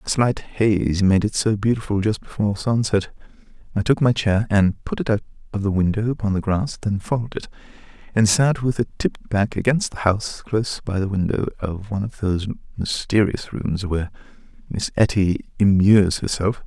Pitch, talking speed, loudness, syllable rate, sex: 105 Hz, 185 wpm, -21 LUFS, 5.4 syllables/s, male